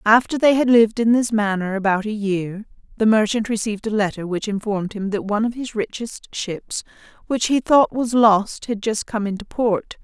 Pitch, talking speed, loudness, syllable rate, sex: 215 Hz, 205 wpm, -20 LUFS, 5.2 syllables/s, female